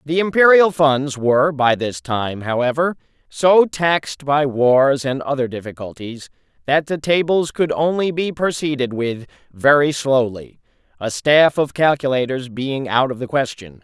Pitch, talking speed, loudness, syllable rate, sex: 140 Hz, 145 wpm, -17 LUFS, 4.3 syllables/s, male